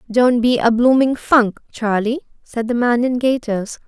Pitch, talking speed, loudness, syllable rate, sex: 240 Hz, 170 wpm, -17 LUFS, 4.3 syllables/s, female